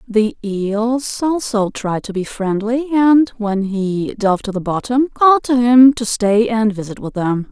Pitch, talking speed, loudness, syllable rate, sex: 225 Hz, 185 wpm, -16 LUFS, 3.9 syllables/s, female